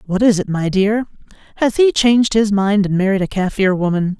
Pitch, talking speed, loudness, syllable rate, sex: 205 Hz, 215 wpm, -16 LUFS, 5.4 syllables/s, female